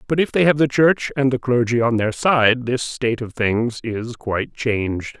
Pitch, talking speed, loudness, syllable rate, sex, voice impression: 125 Hz, 220 wpm, -19 LUFS, 4.7 syllables/s, male, very masculine, very adult-like, slightly old, very thick, very tensed, powerful, bright, slightly hard, slightly clear, fluent, cool, intellectual, slightly refreshing, very sincere, very calm, very mature, friendly, very reassuring, unique, very elegant, wild, sweet, lively, kind, slightly modest